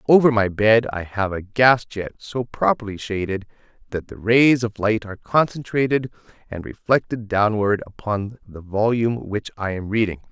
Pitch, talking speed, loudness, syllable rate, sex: 110 Hz, 165 wpm, -21 LUFS, 4.8 syllables/s, male